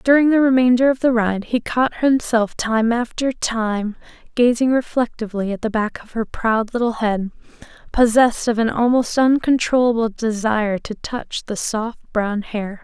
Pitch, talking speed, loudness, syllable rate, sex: 230 Hz, 160 wpm, -19 LUFS, 4.6 syllables/s, female